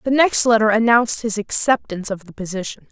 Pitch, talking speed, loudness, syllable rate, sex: 220 Hz, 185 wpm, -18 LUFS, 6.1 syllables/s, female